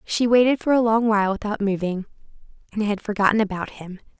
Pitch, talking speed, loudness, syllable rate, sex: 210 Hz, 185 wpm, -21 LUFS, 6.2 syllables/s, female